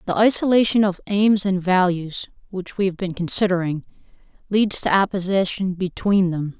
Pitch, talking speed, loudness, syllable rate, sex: 190 Hz, 145 wpm, -20 LUFS, 4.9 syllables/s, female